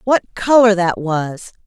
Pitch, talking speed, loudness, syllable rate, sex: 200 Hz, 145 wpm, -15 LUFS, 3.5 syllables/s, female